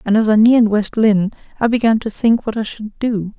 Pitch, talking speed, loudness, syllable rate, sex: 220 Hz, 250 wpm, -16 LUFS, 5.7 syllables/s, female